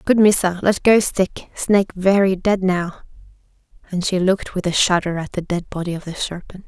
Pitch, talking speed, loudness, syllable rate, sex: 185 Hz, 200 wpm, -19 LUFS, 5.2 syllables/s, female